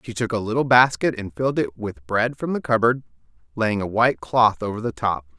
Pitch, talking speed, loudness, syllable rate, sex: 110 Hz, 225 wpm, -21 LUFS, 5.6 syllables/s, male